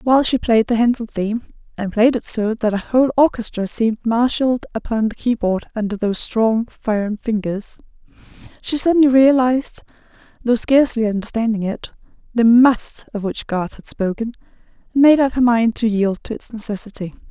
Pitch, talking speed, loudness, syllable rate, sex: 230 Hz, 165 wpm, -18 LUFS, 5.4 syllables/s, female